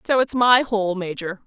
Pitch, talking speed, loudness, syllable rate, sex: 210 Hz, 205 wpm, -19 LUFS, 4.5 syllables/s, female